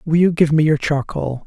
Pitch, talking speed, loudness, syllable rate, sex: 155 Hz, 245 wpm, -17 LUFS, 5.1 syllables/s, male